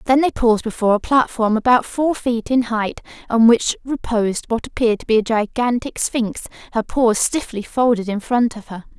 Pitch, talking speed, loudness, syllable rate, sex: 230 Hz, 195 wpm, -18 LUFS, 5.2 syllables/s, female